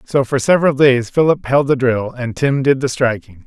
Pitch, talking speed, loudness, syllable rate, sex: 130 Hz, 225 wpm, -15 LUFS, 5.0 syllables/s, male